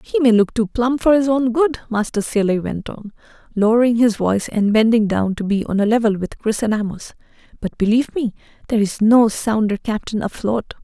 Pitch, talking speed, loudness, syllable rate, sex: 225 Hz, 200 wpm, -18 LUFS, 5.4 syllables/s, female